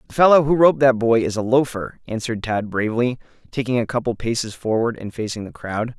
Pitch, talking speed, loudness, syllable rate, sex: 120 Hz, 220 wpm, -20 LUFS, 6.3 syllables/s, male